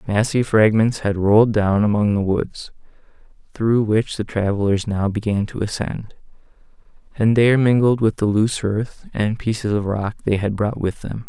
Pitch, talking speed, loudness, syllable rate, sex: 105 Hz, 170 wpm, -19 LUFS, 4.7 syllables/s, male